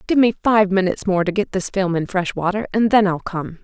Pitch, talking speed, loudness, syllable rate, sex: 195 Hz, 265 wpm, -19 LUFS, 5.7 syllables/s, female